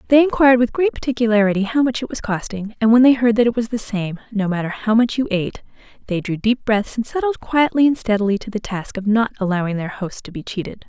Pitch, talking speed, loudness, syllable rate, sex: 225 Hz, 250 wpm, -19 LUFS, 6.3 syllables/s, female